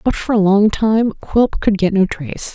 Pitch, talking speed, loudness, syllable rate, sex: 205 Hz, 235 wpm, -16 LUFS, 4.6 syllables/s, female